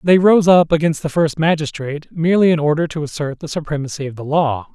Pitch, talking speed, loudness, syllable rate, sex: 155 Hz, 215 wpm, -17 LUFS, 6.1 syllables/s, male